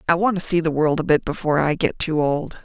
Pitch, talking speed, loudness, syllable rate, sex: 160 Hz, 295 wpm, -20 LUFS, 6.1 syllables/s, female